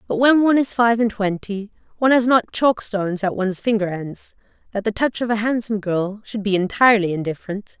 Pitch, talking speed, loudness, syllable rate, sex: 215 Hz, 210 wpm, -19 LUFS, 6.0 syllables/s, female